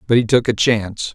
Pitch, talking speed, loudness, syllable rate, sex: 110 Hz, 260 wpm, -17 LUFS, 6.1 syllables/s, male